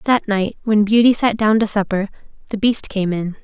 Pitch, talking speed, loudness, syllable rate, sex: 210 Hz, 210 wpm, -17 LUFS, 5.1 syllables/s, female